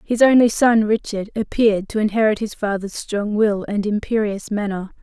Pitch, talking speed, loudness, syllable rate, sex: 210 Hz, 165 wpm, -19 LUFS, 5.0 syllables/s, female